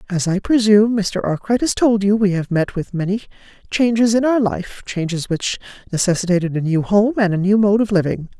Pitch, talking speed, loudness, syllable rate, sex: 200 Hz, 200 wpm, -17 LUFS, 5.5 syllables/s, female